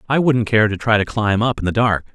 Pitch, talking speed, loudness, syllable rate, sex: 110 Hz, 305 wpm, -17 LUFS, 5.8 syllables/s, male